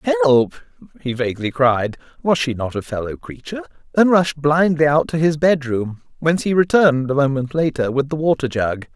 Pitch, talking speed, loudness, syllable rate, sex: 145 Hz, 170 wpm, -18 LUFS, 5.5 syllables/s, male